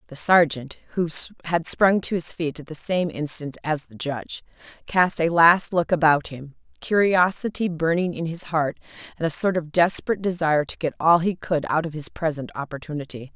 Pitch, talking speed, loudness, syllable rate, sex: 165 Hz, 190 wpm, -22 LUFS, 5.2 syllables/s, female